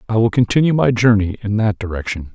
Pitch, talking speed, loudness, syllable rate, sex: 105 Hz, 205 wpm, -16 LUFS, 6.4 syllables/s, male